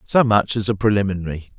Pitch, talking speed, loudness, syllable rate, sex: 105 Hz, 190 wpm, -19 LUFS, 6.2 syllables/s, male